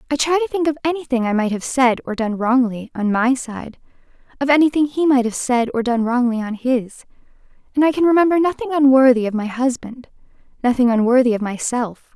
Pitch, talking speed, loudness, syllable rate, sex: 255 Hz, 195 wpm, -18 LUFS, 5.7 syllables/s, female